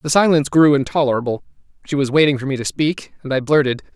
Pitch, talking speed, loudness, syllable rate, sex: 140 Hz, 210 wpm, -17 LUFS, 6.7 syllables/s, male